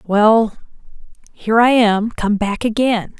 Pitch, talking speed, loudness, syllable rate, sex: 220 Hz, 130 wpm, -15 LUFS, 4.0 syllables/s, female